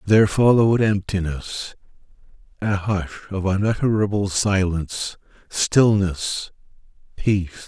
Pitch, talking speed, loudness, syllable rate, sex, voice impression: 100 Hz, 70 wpm, -21 LUFS, 4.3 syllables/s, male, masculine, slightly middle-aged, slightly thick, cool, slightly calm, friendly, slightly reassuring